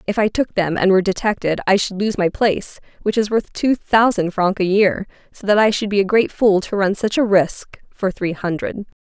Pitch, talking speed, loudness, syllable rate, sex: 200 Hz, 240 wpm, -18 LUFS, 5.2 syllables/s, female